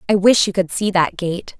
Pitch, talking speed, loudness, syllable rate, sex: 190 Hz, 265 wpm, -17 LUFS, 5.0 syllables/s, female